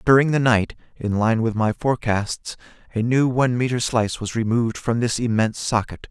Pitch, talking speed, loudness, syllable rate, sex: 115 Hz, 185 wpm, -21 LUFS, 5.5 syllables/s, male